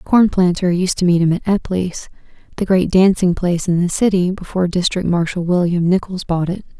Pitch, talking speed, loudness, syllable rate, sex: 180 Hz, 175 wpm, -16 LUFS, 5.4 syllables/s, female